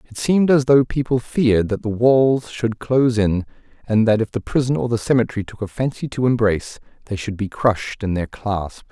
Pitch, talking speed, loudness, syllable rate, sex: 115 Hz, 215 wpm, -19 LUFS, 5.5 syllables/s, male